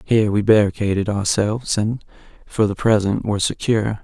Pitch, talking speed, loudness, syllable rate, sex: 105 Hz, 150 wpm, -19 LUFS, 5.7 syllables/s, male